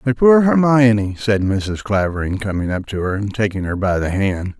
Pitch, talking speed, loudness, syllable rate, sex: 105 Hz, 210 wpm, -17 LUFS, 5.0 syllables/s, male